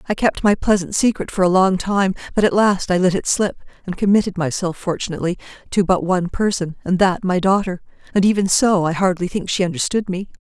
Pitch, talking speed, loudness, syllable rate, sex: 185 Hz, 215 wpm, -18 LUFS, 5.9 syllables/s, female